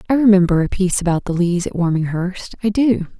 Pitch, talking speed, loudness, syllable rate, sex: 190 Hz, 205 wpm, -17 LUFS, 6.0 syllables/s, female